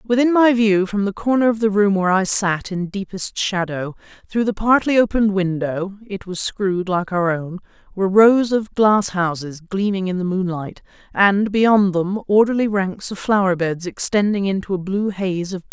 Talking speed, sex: 190 wpm, female